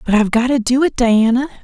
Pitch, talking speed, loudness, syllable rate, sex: 240 Hz, 255 wpm, -15 LUFS, 6.5 syllables/s, female